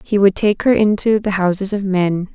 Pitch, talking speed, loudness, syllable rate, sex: 200 Hz, 230 wpm, -16 LUFS, 5.0 syllables/s, female